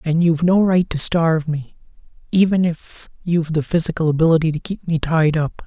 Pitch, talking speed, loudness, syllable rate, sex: 165 Hz, 190 wpm, -18 LUFS, 5.5 syllables/s, male